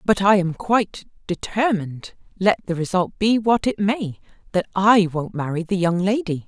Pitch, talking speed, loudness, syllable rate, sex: 195 Hz, 175 wpm, -21 LUFS, 4.8 syllables/s, female